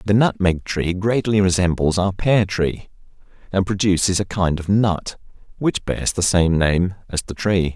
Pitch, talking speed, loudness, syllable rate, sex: 95 Hz, 170 wpm, -19 LUFS, 4.3 syllables/s, male